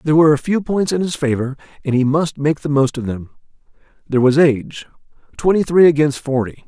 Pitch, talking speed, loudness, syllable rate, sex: 145 Hz, 200 wpm, -17 LUFS, 6.3 syllables/s, male